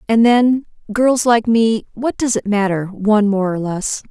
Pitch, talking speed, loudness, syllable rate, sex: 220 Hz, 190 wpm, -16 LUFS, 4.3 syllables/s, female